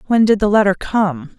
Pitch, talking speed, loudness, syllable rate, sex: 205 Hz, 215 wpm, -15 LUFS, 5.0 syllables/s, female